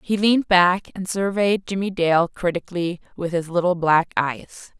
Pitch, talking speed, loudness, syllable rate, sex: 180 Hz, 165 wpm, -21 LUFS, 4.6 syllables/s, female